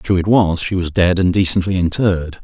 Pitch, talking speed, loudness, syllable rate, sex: 90 Hz, 220 wpm, -16 LUFS, 5.5 syllables/s, male